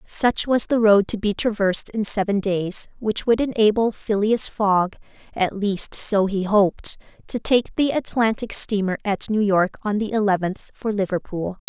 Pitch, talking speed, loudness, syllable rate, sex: 205 Hz, 160 wpm, -20 LUFS, 4.4 syllables/s, female